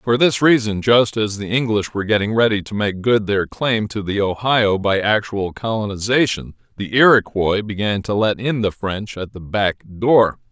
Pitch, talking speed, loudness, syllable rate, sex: 105 Hz, 190 wpm, -18 LUFS, 4.6 syllables/s, male